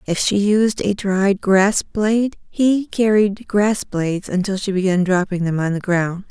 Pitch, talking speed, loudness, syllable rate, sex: 200 Hz, 180 wpm, -18 LUFS, 4.2 syllables/s, female